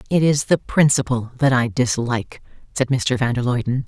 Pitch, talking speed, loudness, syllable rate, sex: 125 Hz, 185 wpm, -19 LUFS, 5.2 syllables/s, female